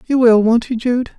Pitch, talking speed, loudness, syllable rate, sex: 240 Hz, 255 wpm, -14 LUFS, 4.8 syllables/s, male